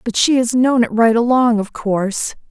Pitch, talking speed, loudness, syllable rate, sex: 230 Hz, 215 wpm, -15 LUFS, 4.8 syllables/s, female